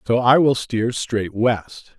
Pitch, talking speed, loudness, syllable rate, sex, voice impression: 120 Hz, 180 wpm, -19 LUFS, 3.3 syllables/s, male, masculine, middle-aged, tensed, powerful, clear, slightly fluent, cool, intellectual, calm, mature, friendly, reassuring, wild, lively, slightly strict